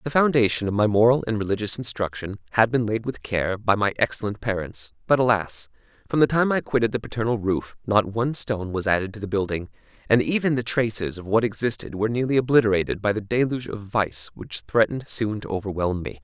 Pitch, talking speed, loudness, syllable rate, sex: 110 Hz, 205 wpm, -23 LUFS, 6.1 syllables/s, male